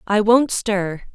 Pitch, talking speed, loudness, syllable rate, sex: 210 Hz, 160 wpm, -18 LUFS, 3.3 syllables/s, female